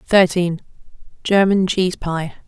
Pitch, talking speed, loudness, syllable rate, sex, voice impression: 180 Hz, 75 wpm, -18 LUFS, 4.2 syllables/s, female, feminine, adult-like, slightly soft, fluent, slightly intellectual, calm, slightly friendly, slightly sweet